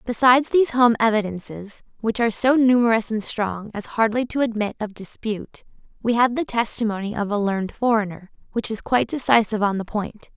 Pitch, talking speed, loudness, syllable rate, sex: 225 Hz, 180 wpm, -21 LUFS, 5.8 syllables/s, female